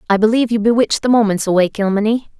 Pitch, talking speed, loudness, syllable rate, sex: 215 Hz, 200 wpm, -15 LUFS, 7.0 syllables/s, female